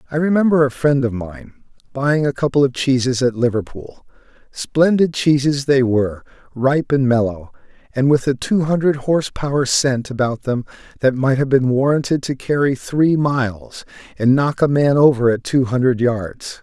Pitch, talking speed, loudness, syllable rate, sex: 135 Hz, 175 wpm, -17 LUFS, 4.8 syllables/s, male